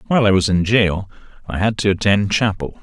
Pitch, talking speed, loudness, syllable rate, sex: 100 Hz, 210 wpm, -17 LUFS, 5.8 syllables/s, male